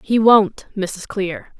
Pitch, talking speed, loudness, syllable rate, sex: 205 Hz, 150 wpm, -18 LUFS, 3.0 syllables/s, female